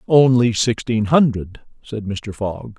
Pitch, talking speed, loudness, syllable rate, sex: 115 Hz, 130 wpm, -18 LUFS, 3.7 syllables/s, male